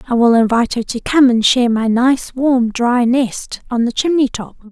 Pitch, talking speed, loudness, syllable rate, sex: 245 Hz, 215 wpm, -14 LUFS, 4.9 syllables/s, female